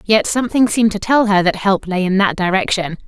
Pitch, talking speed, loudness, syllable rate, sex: 200 Hz, 235 wpm, -15 LUFS, 5.8 syllables/s, female